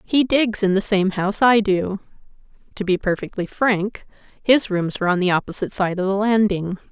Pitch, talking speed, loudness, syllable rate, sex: 200 Hz, 190 wpm, -20 LUFS, 5.3 syllables/s, female